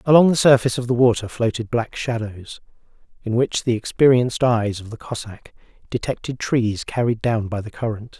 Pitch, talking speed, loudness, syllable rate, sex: 115 Hz, 175 wpm, -20 LUFS, 5.4 syllables/s, male